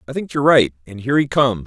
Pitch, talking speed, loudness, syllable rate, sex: 125 Hz, 290 wpm, -17 LUFS, 7.9 syllables/s, male